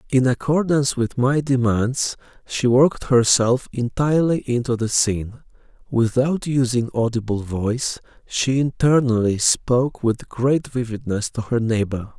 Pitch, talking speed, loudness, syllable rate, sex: 125 Hz, 125 wpm, -20 LUFS, 4.4 syllables/s, male